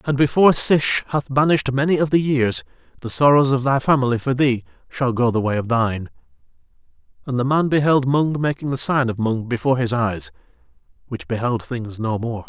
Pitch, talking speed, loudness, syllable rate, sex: 125 Hz, 190 wpm, -19 LUFS, 5.6 syllables/s, male